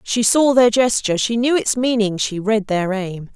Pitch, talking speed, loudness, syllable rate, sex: 220 Hz, 180 wpm, -17 LUFS, 4.6 syllables/s, female